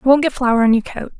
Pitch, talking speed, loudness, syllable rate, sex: 250 Hz, 350 wpm, -15 LUFS, 6.6 syllables/s, female